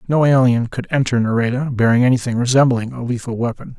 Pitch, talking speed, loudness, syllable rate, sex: 125 Hz, 175 wpm, -17 LUFS, 6.4 syllables/s, male